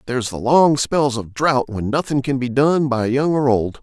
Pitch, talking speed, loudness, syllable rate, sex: 130 Hz, 235 wpm, -18 LUFS, 4.6 syllables/s, male